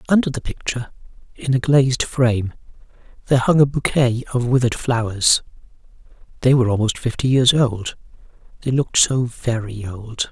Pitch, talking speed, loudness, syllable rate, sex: 125 Hz, 145 wpm, -19 LUFS, 5.6 syllables/s, male